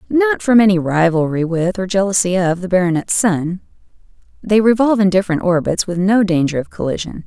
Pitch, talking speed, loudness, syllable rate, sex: 190 Hz, 175 wpm, -15 LUFS, 5.7 syllables/s, female